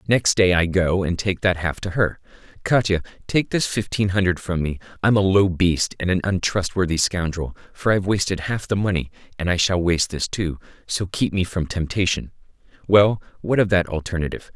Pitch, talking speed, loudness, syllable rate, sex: 90 Hz, 195 wpm, -21 LUFS, 5.3 syllables/s, male